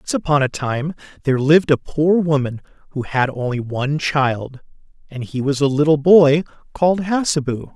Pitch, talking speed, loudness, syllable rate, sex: 145 Hz, 170 wpm, -18 LUFS, 5.5 syllables/s, male